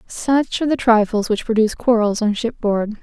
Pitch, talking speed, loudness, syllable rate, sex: 225 Hz, 180 wpm, -18 LUFS, 5.3 syllables/s, female